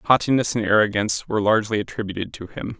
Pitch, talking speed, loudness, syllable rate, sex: 105 Hz, 170 wpm, -21 LUFS, 7.3 syllables/s, male